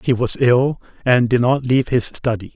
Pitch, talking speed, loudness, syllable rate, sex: 125 Hz, 210 wpm, -17 LUFS, 5.0 syllables/s, male